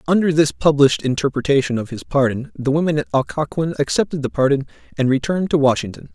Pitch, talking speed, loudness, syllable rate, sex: 145 Hz, 175 wpm, -18 LUFS, 6.5 syllables/s, male